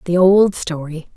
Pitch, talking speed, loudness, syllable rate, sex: 175 Hz, 155 wpm, -15 LUFS, 4.0 syllables/s, female